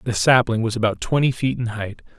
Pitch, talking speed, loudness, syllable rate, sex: 115 Hz, 220 wpm, -20 LUFS, 5.7 syllables/s, male